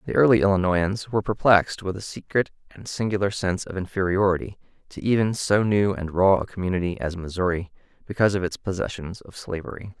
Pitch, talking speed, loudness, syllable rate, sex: 95 Hz, 175 wpm, -23 LUFS, 6.3 syllables/s, male